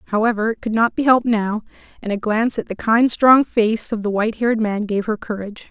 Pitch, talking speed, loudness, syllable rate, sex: 220 Hz, 240 wpm, -18 LUFS, 6.2 syllables/s, female